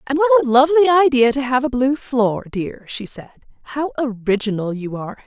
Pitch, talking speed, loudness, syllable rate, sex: 255 Hz, 195 wpm, -17 LUFS, 5.5 syllables/s, female